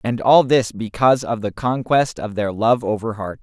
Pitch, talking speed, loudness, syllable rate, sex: 115 Hz, 210 wpm, -18 LUFS, 4.8 syllables/s, male